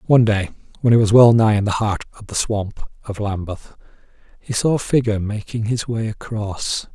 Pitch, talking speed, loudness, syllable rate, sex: 110 Hz, 200 wpm, -19 LUFS, 5.3 syllables/s, male